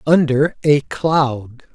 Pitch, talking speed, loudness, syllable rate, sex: 140 Hz, 105 wpm, -16 LUFS, 2.7 syllables/s, male